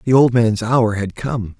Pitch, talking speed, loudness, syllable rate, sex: 115 Hz, 225 wpm, -17 LUFS, 4.1 syllables/s, male